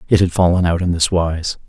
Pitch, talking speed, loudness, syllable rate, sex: 85 Hz, 250 wpm, -16 LUFS, 5.6 syllables/s, male